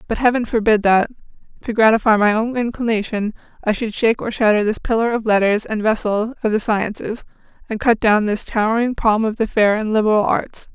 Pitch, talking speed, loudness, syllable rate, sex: 220 Hz, 195 wpm, -18 LUFS, 5.6 syllables/s, female